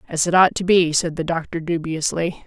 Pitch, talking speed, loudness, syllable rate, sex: 165 Hz, 220 wpm, -19 LUFS, 5.2 syllables/s, female